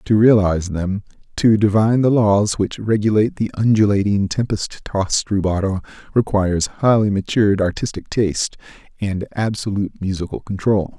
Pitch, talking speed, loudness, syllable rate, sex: 105 Hz, 125 wpm, -18 LUFS, 5.2 syllables/s, male